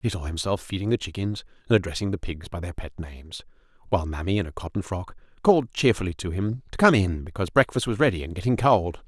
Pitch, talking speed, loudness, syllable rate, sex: 100 Hz, 225 wpm, -25 LUFS, 6.4 syllables/s, male